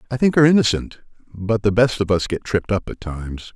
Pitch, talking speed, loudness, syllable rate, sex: 105 Hz, 235 wpm, -19 LUFS, 5.9 syllables/s, male